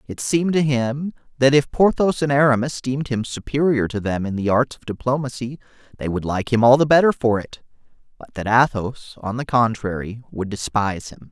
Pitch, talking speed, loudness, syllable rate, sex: 125 Hz, 195 wpm, -20 LUFS, 5.6 syllables/s, male